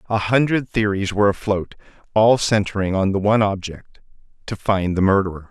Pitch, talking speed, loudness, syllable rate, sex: 100 Hz, 155 wpm, -19 LUFS, 5.6 syllables/s, male